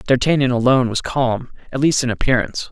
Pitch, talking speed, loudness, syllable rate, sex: 130 Hz, 175 wpm, -18 LUFS, 6.3 syllables/s, male